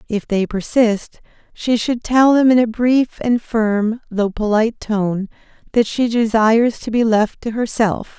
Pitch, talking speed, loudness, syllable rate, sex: 225 Hz, 170 wpm, -17 LUFS, 4.1 syllables/s, female